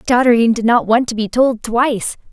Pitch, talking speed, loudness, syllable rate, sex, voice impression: 235 Hz, 205 wpm, -15 LUFS, 5.8 syllables/s, female, feminine, adult-like, tensed, powerful, bright, slightly nasal, slightly cute, intellectual, slightly reassuring, elegant, lively, slightly sharp